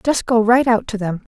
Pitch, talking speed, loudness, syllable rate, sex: 225 Hz, 265 wpm, -17 LUFS, 4.8 syllables/s, female